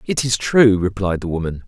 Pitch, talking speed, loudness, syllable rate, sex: 100 Hz, 215 wpm, -17 LUFS, 5.3 syllables/s, male